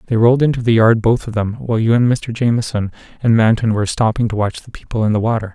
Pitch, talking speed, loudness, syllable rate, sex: 115 Hz, 260 wpm, -16 LUFS, 6.7 syllables/s, male